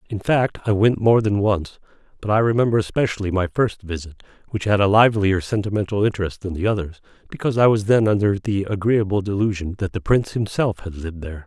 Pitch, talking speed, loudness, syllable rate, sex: 100 Hz, 200 wpm, -20 LUFS, 6.3 syllables/s, male